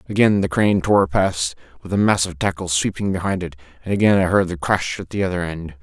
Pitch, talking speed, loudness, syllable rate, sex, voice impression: 90 Hz, 225 wpm, -19 LUFS, 6.1 syllables/s, male, masculine, adult-like, clear, halting, slightly intellectual, friendly, unique, slightly wild, slightly kind